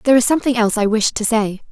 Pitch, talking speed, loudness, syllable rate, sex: 230 Hz, 280 wpm, -16 LUFS, 7.8 syllables/s, female